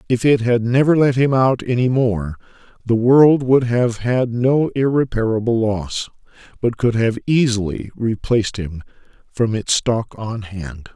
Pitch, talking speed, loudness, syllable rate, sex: 120 Hz, 155 wpm, -17 LUFS, 4.2 syllables/s, male